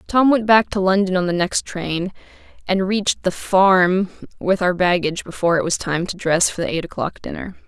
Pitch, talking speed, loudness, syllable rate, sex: 185 Hz, 210 wpm, -19 LUFS, 5.3 syllables/s, female